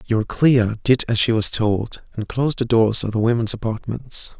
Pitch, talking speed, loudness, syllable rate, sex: 115 Hz, 190 wpm, -19 LUFS, 5.0 syllables/s, male